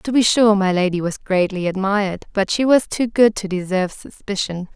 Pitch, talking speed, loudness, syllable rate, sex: 200 Hz, 200 wpm, -18 LUFS, 5.2 syllables/s, female